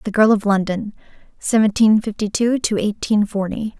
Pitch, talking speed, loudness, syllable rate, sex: 210 Hz, 160 wpm, -18 LUFS, 5.0 syllables/s, female